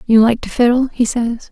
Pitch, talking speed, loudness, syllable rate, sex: 235 Hz, 235 wpm, -15 LUFS, 5.0 syllables/s, female